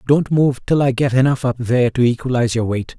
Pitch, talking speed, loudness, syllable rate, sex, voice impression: 125 Hz, 240 wpm, -17 LUFS, 6.0 syllables/s, male, masculine, adult-like, slightly thick, slightly cool, sincere, slightly calm, slightly elegant